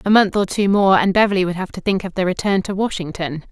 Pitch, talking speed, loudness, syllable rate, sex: 190 Hz, 275 wpm, -18 LUFS, 6.2 syllables/s, female